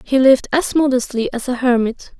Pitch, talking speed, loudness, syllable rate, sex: 260 Hz, 190 wpm, -16 LUFS, 5.5 syllables/s, female